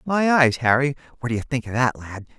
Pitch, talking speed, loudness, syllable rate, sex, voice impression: 130 Hz, 225 wpm, -21 LUFS, 5.3 syllables/s, male, masculine, adult-like, slightly refreshing, sincere, calm, kind